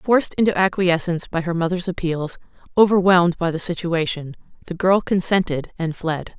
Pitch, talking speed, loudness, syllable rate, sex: 175 Hz, 150 wpm, -20 LUFS, 5.4 syllables/s, female